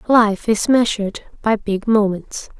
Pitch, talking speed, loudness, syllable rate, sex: 210 Hz, 140 wpm, -18 LUFS, 4.0 syllables/s, female